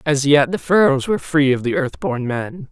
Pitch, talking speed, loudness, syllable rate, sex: 160 Hz, 245 wpm, -17 LUFS, 5.0 syllables/s, female